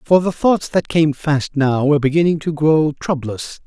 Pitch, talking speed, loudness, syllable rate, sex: 150 Hz, 195 wpm, -17 LUFS, 4.6 syllables/s, male